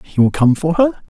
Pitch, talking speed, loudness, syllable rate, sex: 170 Hz, 255 wpm, -15 LUFS, 6.9 syllables/s, male